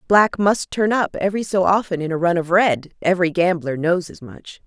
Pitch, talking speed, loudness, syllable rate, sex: 180 Hz, 220 wpm, -19 LUFS, 5.3 syllables/s, female